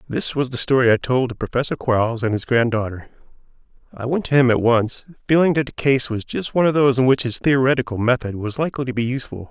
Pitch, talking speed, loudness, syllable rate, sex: 125 Hz, 235 wpm, -19 LUFS, 6.5 syllables/s, male